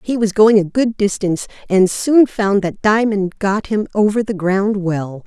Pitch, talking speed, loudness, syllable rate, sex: 205 Hz, 195 wpm, -16 LUFS, 4.4 syllables/s, female